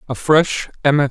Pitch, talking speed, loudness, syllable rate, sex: 140 Hz, 160 wpm, -16 LUFS, 3.9 syllables/s, male